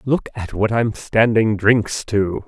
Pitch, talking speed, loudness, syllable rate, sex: 110 Hz, 170 wpm, -18 LUFS, 3.5 syllables/s, male